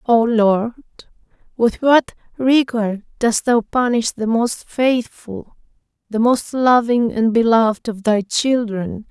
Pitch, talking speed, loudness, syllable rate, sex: 230 Hz, 125 wpm, -17 LUFS, 3.6 syllables/s, female